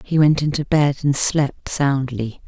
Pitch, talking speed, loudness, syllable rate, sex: 140 Hz, 195 wpm, -19 LUFS, 3.9 syllables/s, female